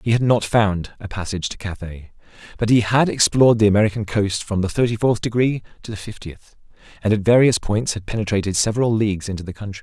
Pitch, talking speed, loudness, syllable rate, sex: 105 Hz, 210 wpm, -19 LUFS, 6.3 syllables/s, male